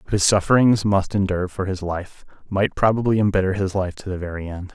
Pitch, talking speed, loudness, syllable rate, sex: 95 Hz, 200 wpm, -21 LUFS, 5.9 syllables/s, male